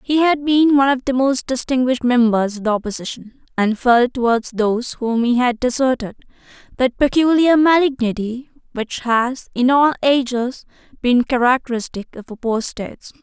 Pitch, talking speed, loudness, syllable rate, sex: 250 Hz, 145 wpm, -17 LUFS, 4.9 syllables/s, female